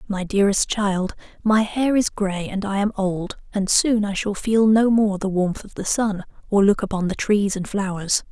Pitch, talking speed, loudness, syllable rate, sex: 200 Hz, 215 wpm, -21 LUFS, 4.6 syllables/s, female